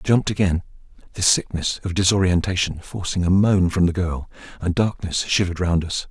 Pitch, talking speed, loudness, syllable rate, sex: 90 Hz, 175 wpm, -21 LUFS, 5.6 syllables/s, male